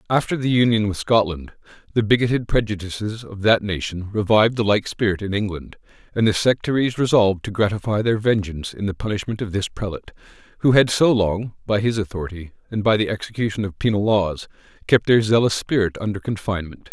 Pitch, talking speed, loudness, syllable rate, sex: 105 Hz, 180 wpm, -20 LUFS, 6.1 syllables/s, male